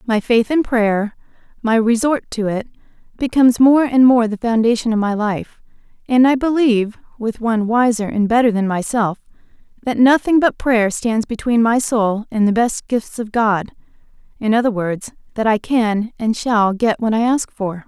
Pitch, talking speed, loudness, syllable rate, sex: 230 Hz, 180 wpm, -17 LUFS, 4.7 syllables/s, female